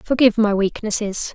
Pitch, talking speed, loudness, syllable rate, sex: 215 Hz, 135 wpm, -19 LUFS, 5.6 syllables/s, female